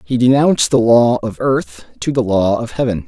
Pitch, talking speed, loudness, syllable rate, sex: 120 Hz, 215 wpm, -15 LUFS, 5.0 syllables/s, male